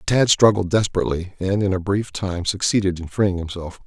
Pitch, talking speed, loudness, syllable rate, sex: 95 Hz, 185 wpm, -20 LUFS, 5.5 syllables/s, male